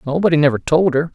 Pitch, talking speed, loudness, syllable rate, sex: 155 Hz, 210 wpm, -15 LUFS, 6.9 syllables/s, male